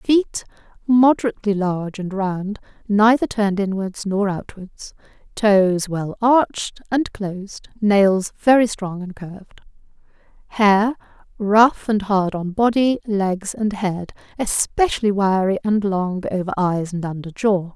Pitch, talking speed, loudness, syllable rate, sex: 205 Hz, 120 wpm, -19 LUFS, 4.0 syllables/s, female